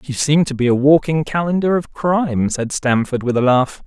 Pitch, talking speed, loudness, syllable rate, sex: 145 Hz, 215 wpm, -17 LUFS, 5.1 syllables/s, male